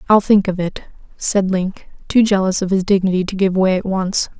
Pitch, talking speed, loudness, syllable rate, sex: 190 Hz, 220 wpm, -17 LUFS, 5.1 syllables/s, female